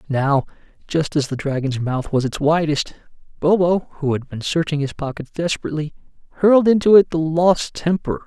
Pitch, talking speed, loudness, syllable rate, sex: 155 Hz, 165 wpm, -19 LUFS, 5.2 syllables/s, male